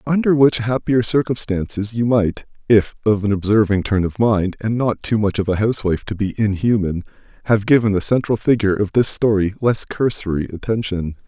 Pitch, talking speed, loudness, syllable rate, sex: 105 Hz, 170 wpm, -18 LUFS, 5.4 syllables/s, male